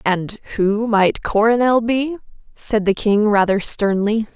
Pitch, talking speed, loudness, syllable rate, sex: 215 Hz, 140 wpm, -17 LUFS, 3.8 syllables/s, female